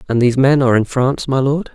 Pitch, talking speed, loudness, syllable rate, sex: 130 Hz, 275 wpm, -15 LUFS, 7.1 syllables/s, male